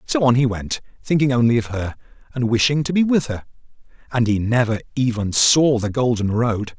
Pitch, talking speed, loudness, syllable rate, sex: 120 Hz, 195 wpm, -19 LUFS, 5.3 syllables/s, male